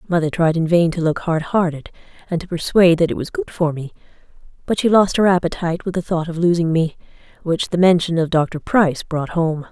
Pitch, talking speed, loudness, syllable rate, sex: 165 Hz, 220 wpm, -18 LUFS, 5.8 syllables/s, female